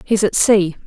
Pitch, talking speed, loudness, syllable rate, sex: 195 Hz, 205 wpm, -15 LUFS, 4.3 syllables/s, female